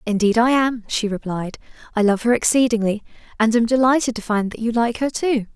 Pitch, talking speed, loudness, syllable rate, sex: 230 Hz, 205 wpm, -19 LUFS, 5.6 syllables/s, female